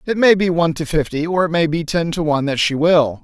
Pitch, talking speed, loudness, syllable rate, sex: 165 Hz, 295 wpm, -17 LUFS, 6.1 syllables/s, male